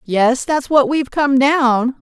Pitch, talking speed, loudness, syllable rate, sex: 265 Hz, 175 wpm, -15 LUFS, 3.7 syllables/s, female